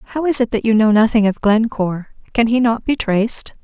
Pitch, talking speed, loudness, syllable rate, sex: 225 Hz, 215 wpm, -16 LUFS, 5.9 syllables/s, female